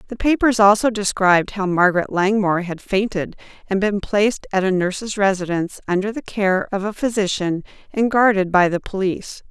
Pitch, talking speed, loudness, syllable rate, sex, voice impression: 200 Hz, 170 wpm, -19 LUFS, 5.5 syllables/s, female, very feminine, adult-like, slightly muffled, elegant, slightly sweet